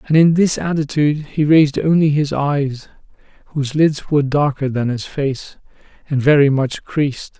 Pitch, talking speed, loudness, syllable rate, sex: 145 Hz, 160 wpm, -17 LUFS, 5.0 syllables/s, male